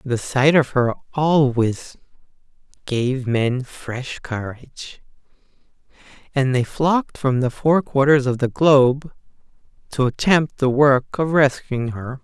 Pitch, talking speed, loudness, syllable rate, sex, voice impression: 135 Hz, 130 wpm, -19 LUFS, 3.8 syllables/s, male, masculine, adult-like, slightly weak, slightly fluent, refreshing, unique